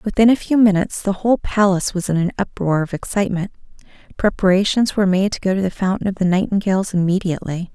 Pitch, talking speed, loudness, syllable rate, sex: 190 Hz, 195 wpm, -18 LUFS, 6.8 syllables/s, female